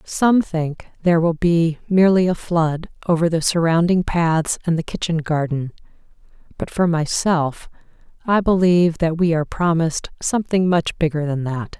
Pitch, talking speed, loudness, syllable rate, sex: 165 Hz, 155 wpm, -19 LUFS, 4.8 syllables/s, female